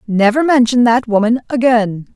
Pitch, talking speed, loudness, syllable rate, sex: 235 Hz, 140 wpm, -13 LUFS, 4.7 syllables/s, female